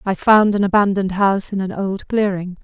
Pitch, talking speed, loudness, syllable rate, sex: 195 Hz, 205 wpm, -17 LUFS, 5.7 syllables/s, female